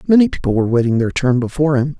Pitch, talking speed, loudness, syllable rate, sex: 135 Hz, 240 wpm, -16 LUFS, 7.4 syllables/s, male